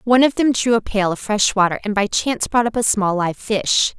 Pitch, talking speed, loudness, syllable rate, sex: 215 Hz, 270 wpm, -18 LUFS, 5.5 syllables/s, female